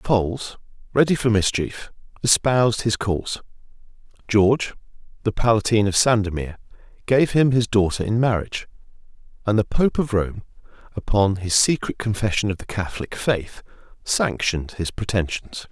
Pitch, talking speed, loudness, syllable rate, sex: 110 Hz, 135 wpm, -21 LUFS, 5.2 syllables/s, male